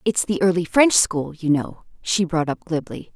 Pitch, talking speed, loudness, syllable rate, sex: 180 Hz, 210 wpm, -20 LUFS, 4.6 syllables/s, female